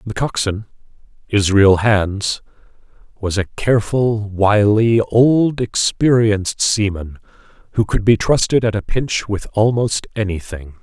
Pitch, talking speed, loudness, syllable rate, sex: 105 Hz, 120 wpm, -16 LUFS, 3.9 syllables/s, male